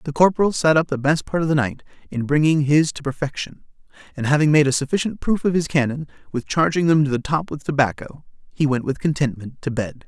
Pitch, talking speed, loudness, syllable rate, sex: 145 Hz, 220 wpm, -20 LUFS, 6.1 syllables/s, male